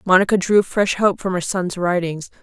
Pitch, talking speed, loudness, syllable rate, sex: 185 Hz, 200 wpm, -18 LUFS, 5.0 syllables/s, female